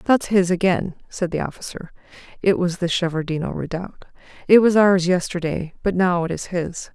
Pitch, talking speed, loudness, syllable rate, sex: 180 Hz, 175 wpm, -20 LUFS, 5.8 syllables/s, female